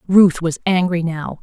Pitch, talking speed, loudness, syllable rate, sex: 175 Hz, 170 wpm, -17 LUFS, 4.2 syllables/s, female